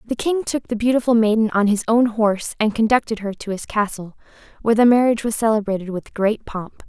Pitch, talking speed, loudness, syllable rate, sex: 220 Hz, 210 wpm, -19 LUFS, 5.9 syllables/s, female